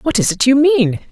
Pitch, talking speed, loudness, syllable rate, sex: 250 Hz, 270 wpm, -13 LUFS, 5.1 syllables/s, female